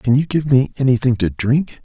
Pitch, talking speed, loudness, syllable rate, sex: 130 Hz, 230 wpm, -17 LUFS, 5.4 syllables/s, male